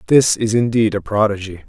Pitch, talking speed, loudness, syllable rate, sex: 110 Hz, 180 wpm, -17 LUFS, 5.7 syllables/s, male